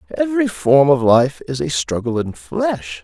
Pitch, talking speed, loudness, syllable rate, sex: 135 Hz, 180 wpm, -17 LUFS, 4.5 syllables/s, male